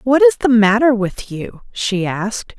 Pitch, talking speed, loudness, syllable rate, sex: 220 Hz, 185 wpm, -15 LUFS, 4.1 syllables/s, female